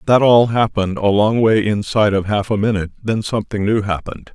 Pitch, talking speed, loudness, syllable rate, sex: 105 Hz, 205 wpm, -16 LUFS, 6.2 syllables/s, male